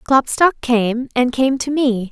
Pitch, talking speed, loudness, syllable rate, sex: 255 Hz, 170 wpm, -17 LUFS, 3.7 syllables/s, female